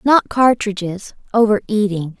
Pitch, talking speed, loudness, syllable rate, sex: 210 Hz, 110 wpm, -17 LUFS, 4.4 syllables/s, female